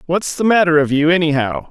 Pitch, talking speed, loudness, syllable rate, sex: 160 Hz, 210 wpm, -15 LUFS, 5.7 syllables/s, male